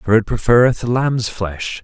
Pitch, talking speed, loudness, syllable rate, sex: 115 Hz, 165 wpm, -16 LUFS, 4.1 syllables/s, male